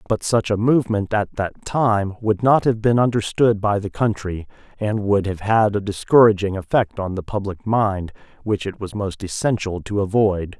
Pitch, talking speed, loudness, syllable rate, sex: 105 Hz, 185 wpm, -20 LUFS, 4.7 syllables/s, male